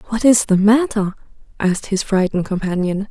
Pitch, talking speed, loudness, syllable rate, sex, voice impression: 205 Hz, 155 wpm, -17 LUFS, 5.7 syllables/s, female, gender-neutral, adult-like, slightly weak, soft, very calm, reassuring, kind